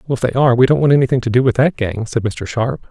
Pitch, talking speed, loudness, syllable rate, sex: 125 Hz, 330 wpm, -15 LUFS, 7.0 syllables/s, male